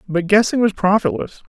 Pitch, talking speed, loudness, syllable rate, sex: 195 Hz, 155 wpm, -17 LUFS, 5.3 syllables/s, male